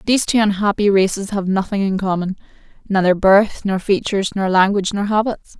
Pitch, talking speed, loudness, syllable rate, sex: 200 Hz, 170 wpm, -17 LUFS, 5.7 syllables/s, female